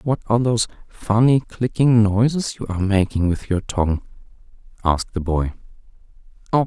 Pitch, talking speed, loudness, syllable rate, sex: 110 Hz, 135 wpm, -20 LUFS, 5.5 syllables/s, male